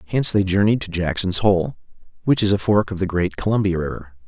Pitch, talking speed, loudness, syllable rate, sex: 95 Hz, 210 wpm, -20 LUFS, 5.9 syllables/s, male